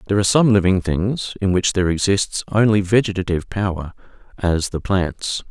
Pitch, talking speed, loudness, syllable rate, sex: 95 Hz, 165 wpm, -19 LUFS, 5.5 syllables/s, male